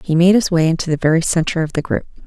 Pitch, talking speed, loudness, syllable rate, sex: 165 Hz, 290 wpm, -16 LUFS, 7.1 syllables/s, female